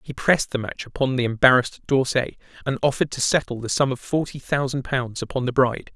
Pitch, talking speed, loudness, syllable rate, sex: 130 Hz, 210 wpm, -22 LUFS, 6.2 syllables/s, male